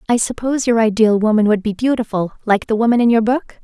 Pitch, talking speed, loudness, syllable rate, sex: 225 Hz, 230 wpm, -16 LUFS, 6.4 syllables/s, female